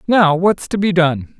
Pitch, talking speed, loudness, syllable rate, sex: 170 Hz, 215 wpm, -15 LUFS, 4.1 syllables/s, male